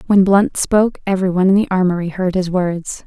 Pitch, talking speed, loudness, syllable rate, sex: 190 Hz, 215 wpm, -16 LUFS, 6.1 syllables/s, female